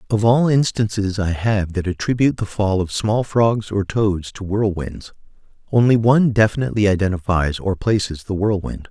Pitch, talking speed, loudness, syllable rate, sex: 105 Hz, 160 wpm, -19 LUFS, 5.1 syllables/s, male